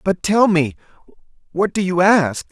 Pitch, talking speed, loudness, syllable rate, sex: 180 Hz, 165 wpm, -17 LUFS, 4.3 syllables/s, male